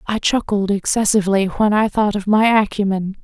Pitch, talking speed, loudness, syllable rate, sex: 205 Hz, 165 wpm, -17 LUFS, 5.2 syllables/s, female